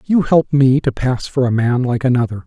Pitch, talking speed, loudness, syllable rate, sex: 130 Hz, 245 wpm, -15 LUFS, 5.1 syllables/s, male